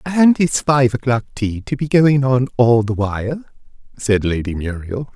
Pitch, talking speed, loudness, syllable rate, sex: 125 Hz, 175 wpm, -17 LUFS, 4.4 syllables/s, male